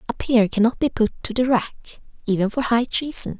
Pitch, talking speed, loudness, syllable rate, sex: 235 Hz, 210 wpm, -20 LUFS, 5.1 syllables/s, female